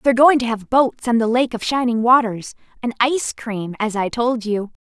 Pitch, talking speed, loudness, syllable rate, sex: 235 Hz, 210 wpm, -18 LUFS, 5.1 syllables/s, female